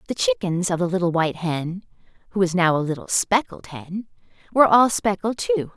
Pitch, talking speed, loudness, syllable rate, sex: 185 Hz, 190 wpm, -21 LUFS, 5.6 syllables/s, female